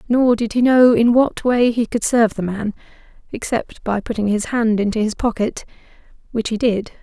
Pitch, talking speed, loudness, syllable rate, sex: 225 Hz, 190 wpm, -18 LUFS, 5.1 syllables/s, female